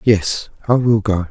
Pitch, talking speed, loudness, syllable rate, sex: 105 Hz, 185 wpm, -17 LUFS, 3.9 syllables/s, male